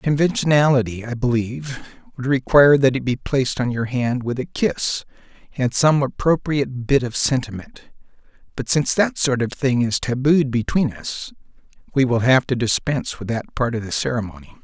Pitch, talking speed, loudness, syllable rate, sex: 125 Hz, 170 wpm, -20 LUFS, 5.3 syllables/s, male